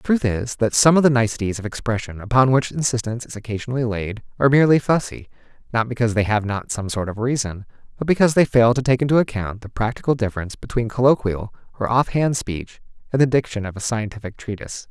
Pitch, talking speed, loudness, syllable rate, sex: 115 Hz, 210 wpm, -20 LUFS, 6.6 syllables/s, male